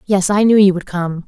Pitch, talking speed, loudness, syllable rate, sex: 190 Hz, 280 wpm, -14 LUFS, 5.3 syllables/s, female